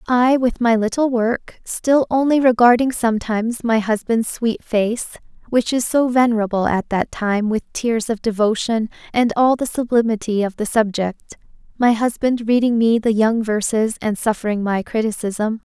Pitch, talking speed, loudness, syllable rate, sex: 230 Hz, 160 wpm, -18 LUFS, 4.7 syllables/s, female